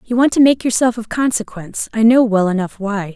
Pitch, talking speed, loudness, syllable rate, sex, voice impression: 225 Hz, 230 wpm, -16 LUFS, 5.6 syllables/s, female, feminine, adult-like, tensed, powerful, bright, fluent, intellectual, calm, slightly friendly, reassuring, elegant, kind